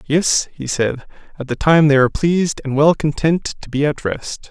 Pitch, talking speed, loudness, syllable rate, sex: 150 Hz, 215 wpm, -17 LUFS, 4.7 syllables/s, male